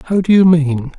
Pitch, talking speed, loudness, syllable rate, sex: 165 Hz, 245 wpm, -12 LUFS, 4.4 syllables/s, male